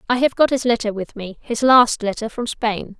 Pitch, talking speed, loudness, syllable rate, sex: 230 Hz, 220 wpm, -18 LUFS, 5.0 syllables/s, female